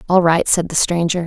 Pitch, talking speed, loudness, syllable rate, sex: 170 Hz, 235 wpm, -16 LUFS, 5.5 syllables/s, female